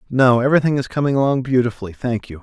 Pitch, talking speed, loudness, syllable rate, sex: 125 Hz, 200 wpm, -18 LUFS, 7.2 syllables/s, male